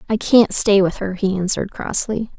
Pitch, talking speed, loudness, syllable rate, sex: 200 Hz, 200 wpm, -17 LUFS, 5.1 syllables/s, female